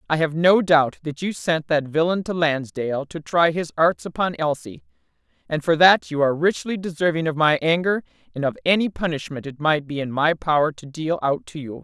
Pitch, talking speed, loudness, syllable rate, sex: 160 Hz, 215 wpm, -21 LUFS, 5.3 syllables/s, female